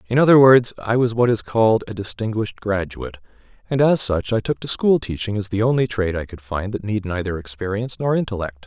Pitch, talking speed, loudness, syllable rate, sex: 110 Hz, 220 wpm, -20 LUFS, 6.1 syllables/s, male